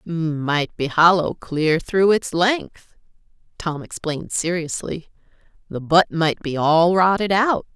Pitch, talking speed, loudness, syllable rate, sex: 170 Hz, 130 wpm, -19 LUFS, 3.6 syllables/s, female